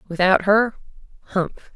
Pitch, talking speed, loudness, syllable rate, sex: 195 Hz, 105 wpm, -20 LUFS, 4.1 syllables/s, female